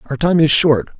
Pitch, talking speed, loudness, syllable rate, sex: 150 Hz, 240 wpm, -14 LUFS, 4.9 syllables/s, male